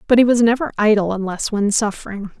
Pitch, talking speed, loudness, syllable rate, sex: 215 Hz, 200 wpm, -17 LUFS, 6.1 syllables/s, female